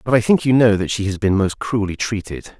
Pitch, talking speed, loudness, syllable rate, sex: 105 Hz, 275 wpm, -18 LUFS, 5.6 syllables/s, male